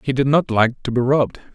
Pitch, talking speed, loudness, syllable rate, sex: 130 Hz, 275 wpm, -18 LUFS, 5.9 syllables/s, male